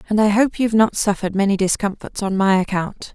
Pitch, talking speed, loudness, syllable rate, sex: 200 Hz, 210 wpm, -18 LUFS, 6.1 syllables/s, female